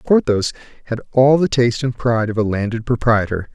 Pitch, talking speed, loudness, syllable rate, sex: 115 Hz, 185 wpm, -17 LUFS, 5.9 syllables/s, male